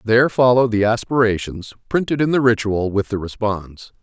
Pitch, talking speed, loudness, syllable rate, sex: 110 Hz, 165 wpm, -18 LUFS, 5.1 syllables/s, male